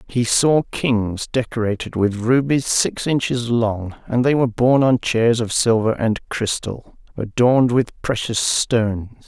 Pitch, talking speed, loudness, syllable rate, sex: 115 Hz, 150 wpm, -19 LUFS, 4.2 syllables/s, male